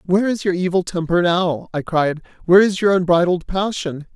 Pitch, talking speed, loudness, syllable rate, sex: 180 Hz, 190 wpm, -18 LUFS, 5.4 syllables/s, male